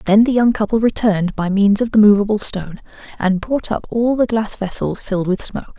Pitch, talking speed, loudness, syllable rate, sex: 210 Hz, 220 wpm, -17 LUFS, 5.6 syllables/s, female